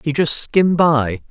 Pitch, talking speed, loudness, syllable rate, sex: 150 Hz, 185 wpm, -16 LUFS, 4.4 syllables/s, male